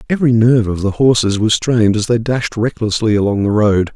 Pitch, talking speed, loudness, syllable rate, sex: 110 Hz, 210 wpm, -14 LUFS, 5.9 syllables/s, male